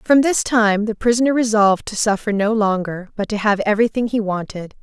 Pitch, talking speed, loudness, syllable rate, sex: 215 Hz, 200 wpm, -18 LUFS, 5.6 syllables/s, female